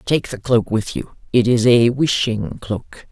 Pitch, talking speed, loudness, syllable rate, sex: 115 Hz, 195 wpm, -18 LUFS, 3.8 syllables/s, male